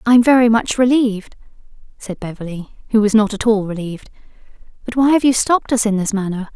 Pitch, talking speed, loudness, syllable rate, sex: 220 Hz, 200 wpm, -16 LUFS, 6.3 syllables/s, female